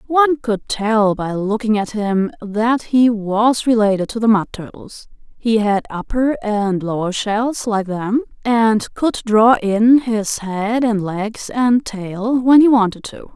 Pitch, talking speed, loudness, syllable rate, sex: 220 Hz, 165 wpm, -17 LUFS, 3.7 syllables/s, female